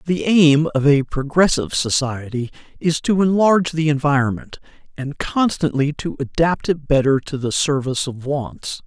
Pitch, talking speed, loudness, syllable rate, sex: 145 Hz, 150 wpm, -18 LUFS, 4.8 syllables/s, male